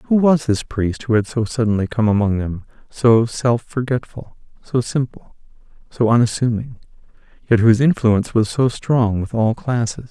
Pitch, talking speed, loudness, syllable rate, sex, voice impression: 115 Hz, 160 wpm, -18 LUFS, 4.8 syllables/s, male, masculine, adult-like, soft, sincere, very calm, slightly sweet, kind